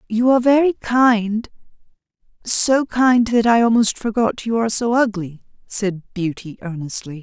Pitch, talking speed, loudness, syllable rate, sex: 220 Hz, 135 wpm, -17 LUFS, 4.4 syllables/s, female